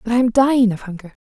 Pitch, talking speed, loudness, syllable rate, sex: 230 Hz, 290 wpm, -16 LUFS, 7.5 syllables/s, female